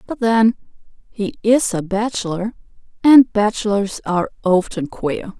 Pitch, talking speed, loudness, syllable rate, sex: 215 Hz, 120 wpm, -17 LUFS, 4.4 syllables/s, female